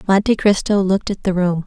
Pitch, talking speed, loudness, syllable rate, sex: 195 Hz, 215 wpm, -17 LUFS, 6.0 syllables/s, female